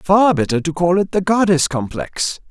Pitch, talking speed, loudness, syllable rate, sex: 175 Hz, 190 wpm, -17 LUFS, 4.7 syllables/s, male